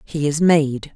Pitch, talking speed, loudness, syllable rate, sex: 150 Hz, 190 wpm, -18 LUFS, 3.5 syllables/s, female